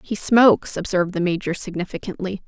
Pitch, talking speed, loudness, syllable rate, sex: 190 Hz, 145 wpm, -20 LUFS, 6.0 syllables/s, female